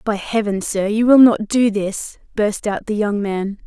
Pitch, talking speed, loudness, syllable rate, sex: 210 Hz, 215 wpm, -17 LUFS, 4.2 syllables/s, female